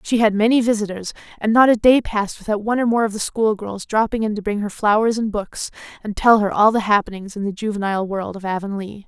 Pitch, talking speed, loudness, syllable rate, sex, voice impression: 210 Hz, 240 wpm, -19 LUFS, 6.2 syllables/s, female, very feminine, slightly adult-like, thin, tensed, powerful, slightly bright, slightly soft, very clear, very fluent, cool, very intellectual, refreshing, very sincere, calm, friendly, reassuring, unique, slightly elegant, wild, sweet, slightly lively, slightly strict, slightly intense